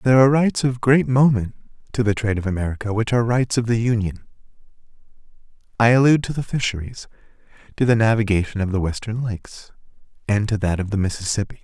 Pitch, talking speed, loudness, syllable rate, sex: 110 Hz, 175 wpm, -20 LUFS, 6.7 syllables/s, male